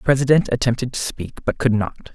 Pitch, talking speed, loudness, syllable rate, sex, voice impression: 120 Hz, 225 wpm, -20 LUFS, 5.7 syllables/s, male, masculine, adult-like, slightly muffled, slightly sincere, very calm, slightly reassuring, kind, slightly modest